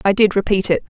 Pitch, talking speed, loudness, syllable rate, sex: 200 Hz, 245 wpm, -17 LUFS, 6.5 syllables/s, female